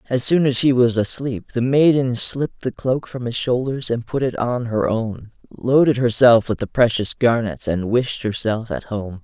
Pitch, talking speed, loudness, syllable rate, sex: 120 Hz, 200 wpm, -19 LUFS, 4.5 syllables/s, male